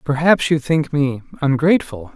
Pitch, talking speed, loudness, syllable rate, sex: 145 Hz, 140 wpm, -17 LUFS, 4.9 syllables/s, male